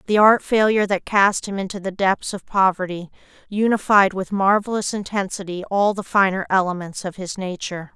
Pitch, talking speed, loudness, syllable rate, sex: 195 Hz, 165 wpm, -20 LUFS, 5.3 syllables/s, female